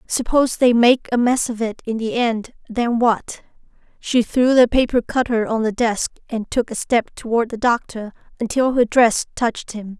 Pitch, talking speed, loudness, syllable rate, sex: 235 Hz, 190 wpm, -19 LUFS, 4.7 syllables/s, female